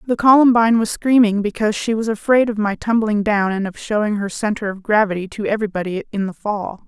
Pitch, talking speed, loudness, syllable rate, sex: 210 Hz, 210 wpm, -18 LUFS, 6.0 syllables/s, female